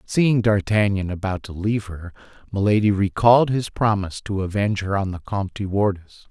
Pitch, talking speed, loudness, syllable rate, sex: 100 Hz, 170 wpm, -21 LUFS, 5.8 syllables/s, male